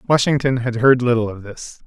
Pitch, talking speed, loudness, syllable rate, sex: 125 Hz, 195 wpm, -17 LUFS, 5.1 syllables/s, male